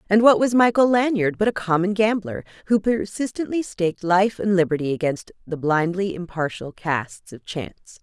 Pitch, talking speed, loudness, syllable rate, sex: 190 Hz, 165 wpm, -21 LUFS, 5.1 syllables/s, female